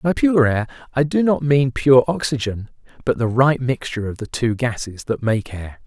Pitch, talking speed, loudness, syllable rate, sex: 125 Hz, 205 wpm, -19 LUFS, 4.8 syllables/s, male